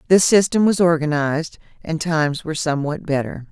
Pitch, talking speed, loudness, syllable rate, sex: 160 Hz, 155 wpm, -19 LUFS, 5.8 syllables/s, female